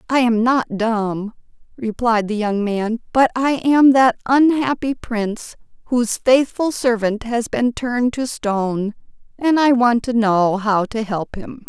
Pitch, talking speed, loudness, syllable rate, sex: 235 Hz, 160 wpm, -18 LUFS, 4.0 syllables/s, female